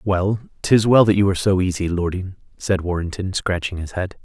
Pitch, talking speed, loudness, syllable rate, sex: 95 Hz, 200 wpm, -20 LUFS, 5.4 syllables/s, male